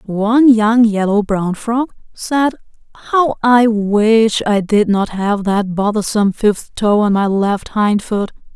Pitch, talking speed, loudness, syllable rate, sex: 215 Hz, 145 wpm, -14 LUFS, 3.7 syllables/s, female